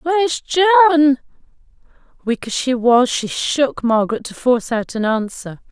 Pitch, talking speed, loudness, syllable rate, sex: 255 Hz, 145 wpm, -17 LUFS, 4.7 syllables/s, female